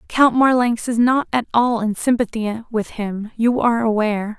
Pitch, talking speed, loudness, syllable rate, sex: 230 Hz, 180 wpm, -18 LUFS, 4.8 syllables/s, female